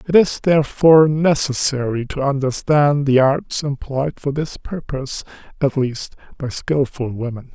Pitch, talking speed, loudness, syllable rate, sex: 140 Hz, 135 wpm, -18 LUFS, 4.4 syllables/s, male